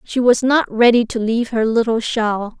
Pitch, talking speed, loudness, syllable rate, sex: 230 Hz, 210 wpm, -16 LUFS, 4.8 syllables/s, female